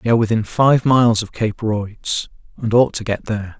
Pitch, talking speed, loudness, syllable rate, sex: 110 Hz, 215 wpm, -18 LUFS, 5.4 syllables/s, male